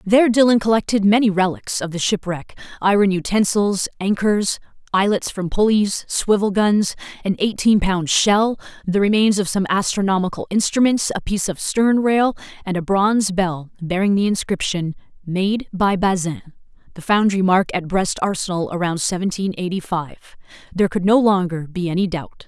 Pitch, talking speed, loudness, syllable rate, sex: 195 Hz, 150 wpm, -19 LUFS, 5.0 syllables/s, female